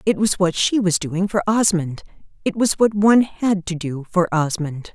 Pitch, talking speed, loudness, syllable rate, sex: 185 Hz, 205 wpm, -19 LUFS, 4.7 syllables/s, female